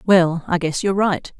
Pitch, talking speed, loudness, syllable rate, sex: 175 Hz, 215 wpm, -19 LUFS, 5.0 syllables/s, female